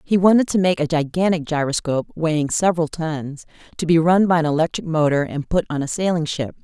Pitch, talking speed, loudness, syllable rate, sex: 160 Hz, 210 wpm, -19 LUFS, 5.9 syllables/s, female